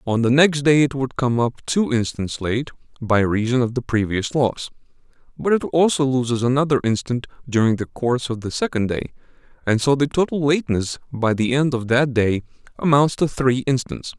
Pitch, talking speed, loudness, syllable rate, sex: 125 Hz, 190 wpm, -20 LUFS, 5.3 syllables/s, male